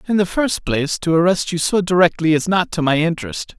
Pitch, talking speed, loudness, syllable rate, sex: 170 Hz, 235 wpm, -17 LUFS, 5.8 syllables/s, male